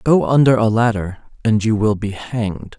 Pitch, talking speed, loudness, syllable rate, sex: 110 Hz, 195 wpm, -17 LUFS, 4.6 syllables/s, male